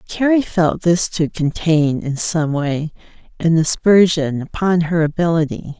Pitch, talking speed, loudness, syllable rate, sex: 165 Hz, 135 wpm, -17 LUFS, 4.2 syllables/s, female